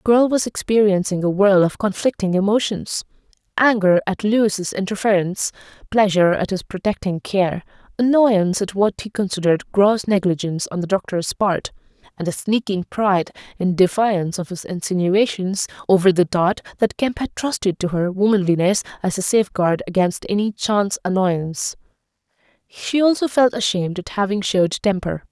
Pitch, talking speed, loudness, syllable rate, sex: 195 Hz, 145 wpm, -19 LUFS, 5.3 syllables/s, female